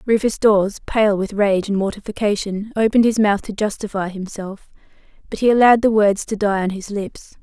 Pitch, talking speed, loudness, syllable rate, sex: 205 Hz, 185 wpm, -18 LUFS, 5.5 syllables/s, female